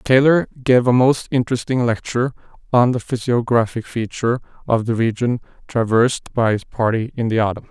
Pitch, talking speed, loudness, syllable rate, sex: 120 Hz, 155 wpm, -18 LUFS, 5.6 syllables/s, male